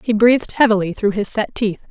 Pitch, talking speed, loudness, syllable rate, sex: 215 Hz, 220 wpm, -17 LUFS, 5.6 syllables/s, female